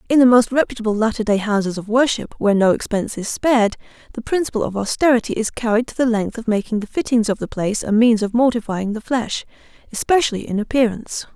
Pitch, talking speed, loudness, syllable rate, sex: 225 Hz, 205 wpm, -19 LUFS, 6.5 syllables/s, female